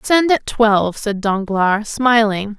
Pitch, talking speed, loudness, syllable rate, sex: 220 Hz, 140 wpm, -16 LUFS, 3.6 syllables/s, female